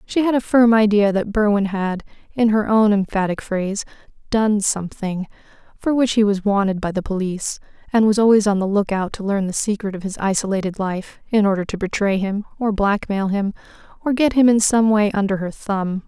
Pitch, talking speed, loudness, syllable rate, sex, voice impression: 205 Hz, 205 wpm, -19 LUFS, 5.4 syllables/s, female, feminine, adult-like, relaxed, slightly powerful, soft, fluent, intellectual, calm, slightly friendly, elegant, slightly sharp